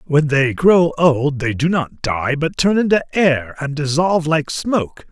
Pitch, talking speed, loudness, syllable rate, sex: 155 Hz, 190 wpm, -17 LUFS, 4.2 syllables/s, male